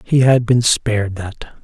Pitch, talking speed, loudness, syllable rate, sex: 115 Hz, 185 wpm, -15 LUFS, 4.1 syllables/s, male